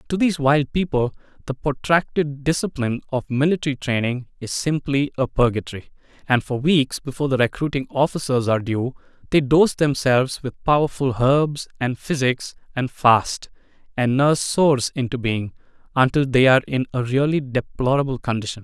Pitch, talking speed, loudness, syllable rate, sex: 135 Hz, 150 wpm, -21 LUFS, 5.3 syllables/s, male